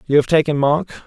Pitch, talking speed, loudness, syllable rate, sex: 145 Hz, 225 wpm, -17 LUFS, 6.2 syllables/s, male